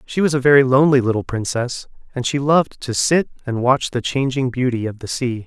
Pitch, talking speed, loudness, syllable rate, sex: 130 Hz, 220 wpm, -18 LUFS, 5.7 syllables/s, male